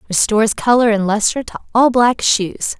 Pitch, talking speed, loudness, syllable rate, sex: 225 Hz, 170 wpm, -15 LUFS, 4.8 syllables/s, female